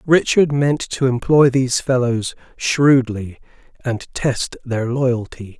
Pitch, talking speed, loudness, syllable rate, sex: 125 Hz, 120 wpm, -18 LUFS, 3.6 syllables/s, male